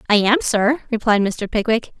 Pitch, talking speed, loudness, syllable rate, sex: 220 Hz, 180 wpm, -18 LUFS, 4.9 syllables/s, female